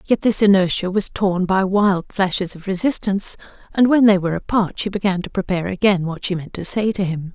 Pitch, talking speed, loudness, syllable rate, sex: 190 Hz, 220 wpm, -19 LUFS, 5.7 syllables/s, female